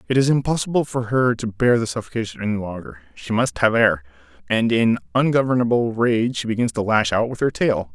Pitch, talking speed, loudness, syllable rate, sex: 115 Hz, 205 wpm, -20 LUFS, 5.7 syllables/s, male